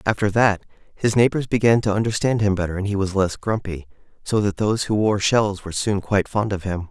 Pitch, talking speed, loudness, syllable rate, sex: 100 Hz, 225 wpm, -21 LUFS, 5.9 syllables/s, male